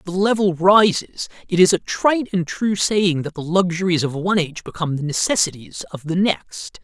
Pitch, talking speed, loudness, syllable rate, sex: 180 Hz, 195 wpm, -19 LUFS, 5.3 syllables/s, male